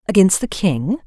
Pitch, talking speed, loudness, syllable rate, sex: 185 Hz, 170 wpm, -17 LUFS, 4.8 syllables/s, female